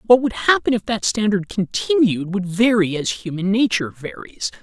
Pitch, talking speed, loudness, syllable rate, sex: 205 Hz, 170 wpm, -19 LUFS, 5.0 syllables/s, male